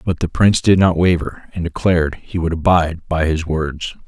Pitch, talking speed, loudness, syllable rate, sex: 85 Hz, 205 wpm, -17 LUFS, 5.2 syllables/s, male